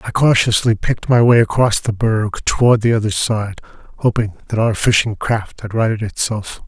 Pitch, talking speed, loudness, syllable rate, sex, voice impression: 110 Hz, 180 wpm, -16 LUFS, 5.0 syllables/s, male, masculine, adult-like, slightly thick, slightly muffled, slightly cool, slightly refreshing, sincere